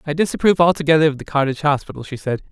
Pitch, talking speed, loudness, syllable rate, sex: 150 Hz, 215 wpm, -18 LUFS, 8.2 syllables/s, male